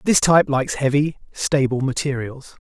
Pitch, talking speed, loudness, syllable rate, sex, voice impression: 140 Hz, 135 wpm, -19 LUFS, 5.2 syllables/s, male, very masculine, slightly old, thick, tensed, very powerful, slightly bright, slightly hard, slightly muffled, fluent, raspy, cool, intellectual, refreshing, sincere, slightly calm, mature, slightly friendly, slightly reassuring, very unique, slightly elegant, wild, very lively, slightly strict, intense